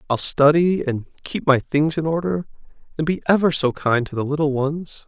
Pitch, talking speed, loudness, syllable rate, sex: 150 Hz, 200 wpm, -20 LUFS, 5.1 syllables/s, male